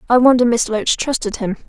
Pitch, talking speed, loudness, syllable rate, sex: 235 Hz, 215 wpm, -16 LUFS, 5.7 syllables/s, female